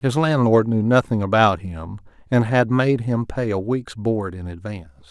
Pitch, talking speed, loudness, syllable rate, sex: 110 Hz, 190 wpm, -20 LUFS, 4.6 syllables/s, male